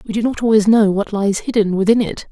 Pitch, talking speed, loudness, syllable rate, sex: 210 Hz, 260 wpm, -16 LUFS, 5.9 syllables/s, female